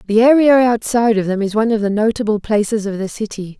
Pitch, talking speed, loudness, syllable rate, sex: 215 Hz, 235 wpm, -15 LUFS, 6.5 syllables/s, female